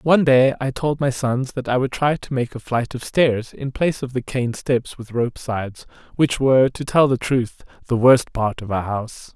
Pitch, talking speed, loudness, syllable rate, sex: 125 Hz, 235 wpm, -20 LUFS, 4.8 syllables/s, male